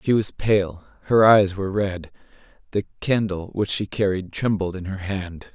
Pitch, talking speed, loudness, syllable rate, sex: 100 Hz, 175 wpm, -22 LUFS, 4.5 syllables/s, male